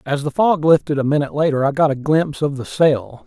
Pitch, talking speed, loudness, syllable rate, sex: 145 Hz, 255 wpm, -17 LUFS, 6.0 syllables/s, male